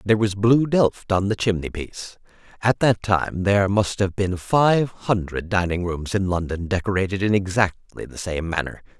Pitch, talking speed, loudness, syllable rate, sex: 100 Hz, 180 wpm, -21 LUFS, 4.8 syllables/s, male